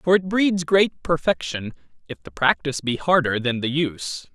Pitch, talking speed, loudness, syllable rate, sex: 150 Hz, 180 wpm, -21 LUFS, 4.9 syllables/s, male